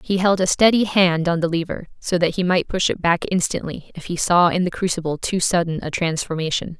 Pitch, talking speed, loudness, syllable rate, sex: 175 Hz, 230 wpm, -20 LUFS, 5.5 syllables/s, female